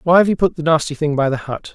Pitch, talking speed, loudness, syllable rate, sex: 155 Hz, 345 wpm, -17 LUFS, 6.7 syllables/s, male